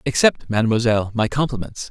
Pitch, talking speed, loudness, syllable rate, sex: 120 Hz, 125 wpm, -20 LUFS, 6.3 syllables/s, male